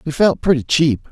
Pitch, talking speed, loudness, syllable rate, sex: 145 Hz, 215 wpm, -16 LUFS, 5.1 syllables/s, male